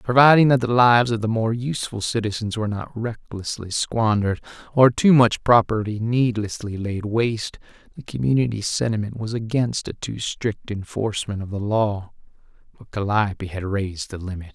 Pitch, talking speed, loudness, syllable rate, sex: 110 Hz, 155 wpm, -21 LUFS, 5.2 syllables/s, male